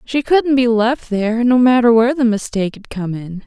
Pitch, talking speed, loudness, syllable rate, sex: 235 Hz, 225 wpm, -15 LUFS, 5.4 syllables/s, female